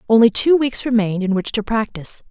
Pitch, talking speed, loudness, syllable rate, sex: 225 Hz, 210 wpm, -17 LUFS, 6.3 syllables/s, female